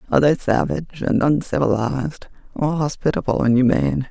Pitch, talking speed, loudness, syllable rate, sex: 140 Hz, 130 wpm, -19 LUFS, 5.8 syllables/s, female